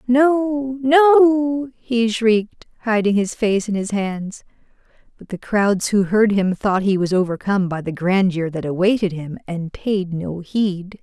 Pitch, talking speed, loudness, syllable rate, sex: 210 Hz, 165 wpm, -19 LUFS, 3.9 syllables/s, female